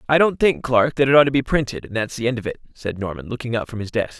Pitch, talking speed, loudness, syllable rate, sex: 125 Hz, 330 wpm, -20 LUFS, 6.8 syllables/s, male